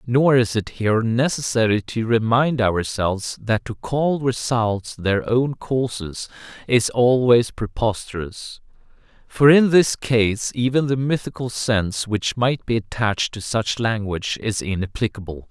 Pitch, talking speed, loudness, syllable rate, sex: 115 Hz, 135 wpm, -20 LUFS, 4.2 syllables/s, male